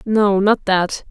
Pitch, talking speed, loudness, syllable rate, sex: 200 Hz, 160 wpm, -16 LUFS, 3.0 syllables/s, female